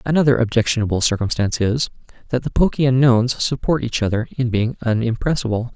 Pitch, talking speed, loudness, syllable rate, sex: 120 Hz, 145 wpm, -19 LUFS, 6.1 syllables/s, male